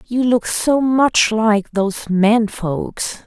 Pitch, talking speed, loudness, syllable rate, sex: 220 Hz, 145 wpm, -17 LUFS, 2.9 syllables/s, female